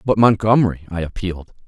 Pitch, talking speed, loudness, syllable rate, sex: 100 Hz, 145 wpm, -18 LUFS, 6.6 syllables/s, male